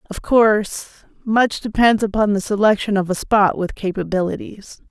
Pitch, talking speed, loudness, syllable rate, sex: 205 Hz, 145 wpm, -18 LUFS, 4.9 syllables/s, female